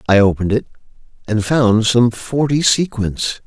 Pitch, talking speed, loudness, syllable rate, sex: 120 Hz, 140 wpm, -16 LUFS, 4.5 syllables/s, male